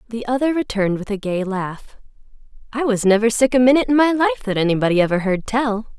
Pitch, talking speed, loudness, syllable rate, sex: 220 Hz, 210 wpm, -18 LUFS, 6.3 syllables/s, female